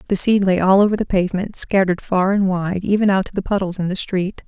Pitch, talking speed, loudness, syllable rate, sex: 190 Hz, 255 wpm, -18 LUFS, 6.1 syllables/s, female